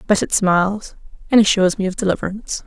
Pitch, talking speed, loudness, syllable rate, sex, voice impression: 195 Hz, 160 wpm, -17 LUFS, 6.9 syllables/s, female, feminine, adult-like, soft, calm, slightly sweet